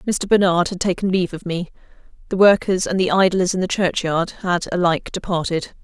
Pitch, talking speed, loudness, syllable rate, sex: 180 Hz, 185 wpm, -19 LUFS, 5.6 syllables/s, female